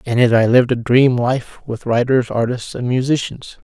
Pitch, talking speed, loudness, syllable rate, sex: 120 Hz, 195 wpm, -16 LUFS, 4.9 syllables/s, male